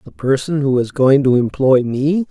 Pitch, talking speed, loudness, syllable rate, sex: 135 Hz, 210 wpm, -15 LUFS, 4.6 syllables/s, male